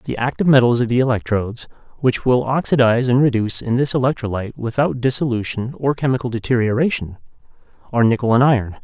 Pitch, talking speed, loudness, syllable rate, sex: 120 Hz, 145 wpm, -18 LUFS, 6.8 syllables/s, male